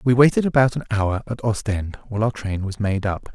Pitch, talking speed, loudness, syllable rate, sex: 110 Hz, 235 wpm, -21 LUFS, 5.7 syllables/s, male